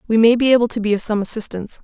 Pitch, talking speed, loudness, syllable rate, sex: 220 Hz, 295 wpm, -17 LUFS, 7.8 syllables/s, female